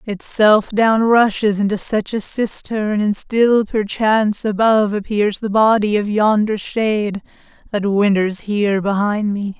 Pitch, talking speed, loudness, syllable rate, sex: 210 Hz, 140 wpm, -16 LUFS, 4.1 syllables/s, female